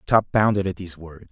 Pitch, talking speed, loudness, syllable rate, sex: 95 Hz, 225 wpm, -21 LUFS, 6.1 syllables/s, male